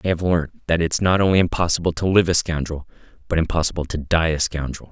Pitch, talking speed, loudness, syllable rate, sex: 80 Hz, 220 wpm, -20 LUFS, 6.2 syllables/s, male